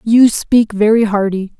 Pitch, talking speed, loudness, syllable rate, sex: 215 Hz, 150 wpm, -13 LUFS, 4.1 syllables/s, female